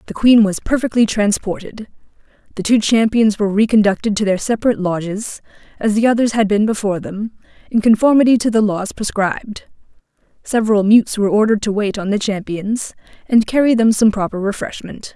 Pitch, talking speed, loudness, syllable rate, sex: 215 Hz, 165 wpm, -16 LUFS, 5.8 syllables/s, female